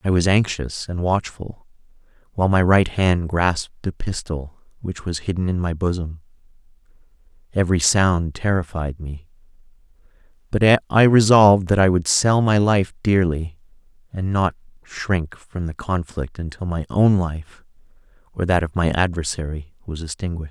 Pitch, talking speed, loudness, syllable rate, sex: 90 Hz, 145 wpm, -20 LUFS, 4.7 syllables/s, male